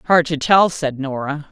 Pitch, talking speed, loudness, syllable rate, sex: 155 Hz, 200 wpm, -17 LUFS, 4.1 syllables/s, female